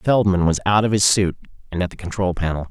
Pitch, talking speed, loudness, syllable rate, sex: 95 Hz, 245 wpm, -19 LUFS, 6.2 syllables/s, male